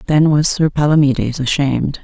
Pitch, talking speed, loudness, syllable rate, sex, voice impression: 145 Hz, 145 wpm, -15 LUFS, 5.4 syllables/s, female, feminine, middle-aged, slightly weak, slightly dark, slightly muffled, fluent, intellectual, calm, elegant, slightly strict, sharp